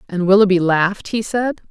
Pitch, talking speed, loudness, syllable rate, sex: 195 Hz, 175 wpm, -16 LUFS, 5.4 syllables/s, female